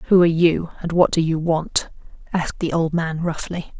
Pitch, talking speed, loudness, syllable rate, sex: 165 Hz, 205 wpm, -20 LUFS, 5.0 syllables/s, female